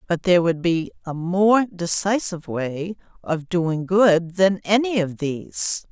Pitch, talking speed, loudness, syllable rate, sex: 180 Hz, 150 wpm, -21 LUFS, 4.0 syllables/s, female